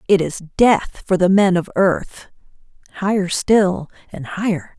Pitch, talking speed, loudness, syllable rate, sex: 185 Hz, 150 wpm, -17 LUFS, 4.0 syllables/s, female